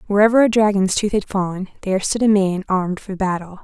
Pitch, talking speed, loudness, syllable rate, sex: 200 Hz, 215 wpm, -18 LUFS, 6.1 syllables/s, female